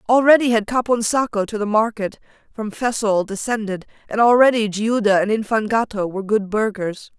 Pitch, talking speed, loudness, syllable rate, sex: 215 Hz, 140 wpm, -19 LUFS, 5.3 syllables/s, female